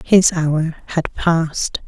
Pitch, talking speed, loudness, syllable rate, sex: 165 Hz, 130 wpm, -18 LUFS, 3.2 syllables/s, female